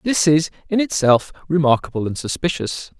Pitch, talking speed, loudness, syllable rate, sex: 155 Hz, 140 wpm, -19 LUFS, 5.2 syllables/s, male